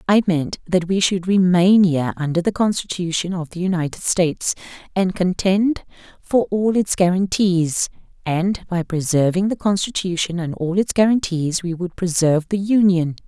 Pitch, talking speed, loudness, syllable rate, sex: 180 Hz, 155 wpm, -19 LUFS, 4.8 syllables/s, female